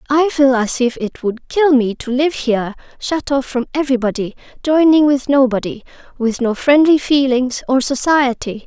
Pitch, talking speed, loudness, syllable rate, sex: 265 Hz, 150 wpm, -15 LUFS, 4.8 syllables/s, female